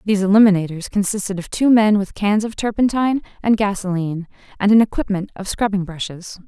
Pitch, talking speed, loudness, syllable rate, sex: 200 Hz, 165 wpm, -18 LUFS, 6.1 syllables/s, female